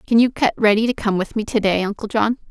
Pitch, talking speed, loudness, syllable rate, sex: 220 Hz, 265 wpm, -19 LUFS, 6.2 syllables/s, female